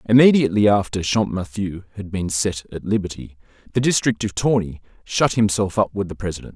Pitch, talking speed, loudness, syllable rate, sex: 100 Hz, 155 wpm, -20 LUFS, 5.6 syllables/s, male